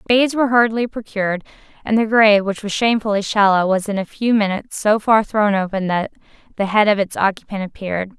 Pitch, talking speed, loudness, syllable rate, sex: 210 Hz, 200 wpm, -17 LUFS, 6.4 syllables/s, female